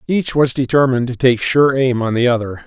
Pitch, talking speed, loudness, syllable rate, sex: 125 Hz, 225 wpm, -15 LUFS, 5.6 syllables/s, male